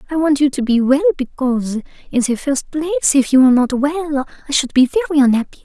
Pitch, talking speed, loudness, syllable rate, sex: 270 Hz, 225 wpm, -16 LUFS, 6.7 syllables/s, female